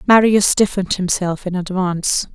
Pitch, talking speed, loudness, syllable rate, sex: 190 Hz, 130 wpm, -17 LUFS, 5.1 syllables/s, female